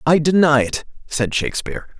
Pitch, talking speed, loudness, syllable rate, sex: 150 Hz, 150 wpm, -18 LUFS, 5.6 syllables/s, male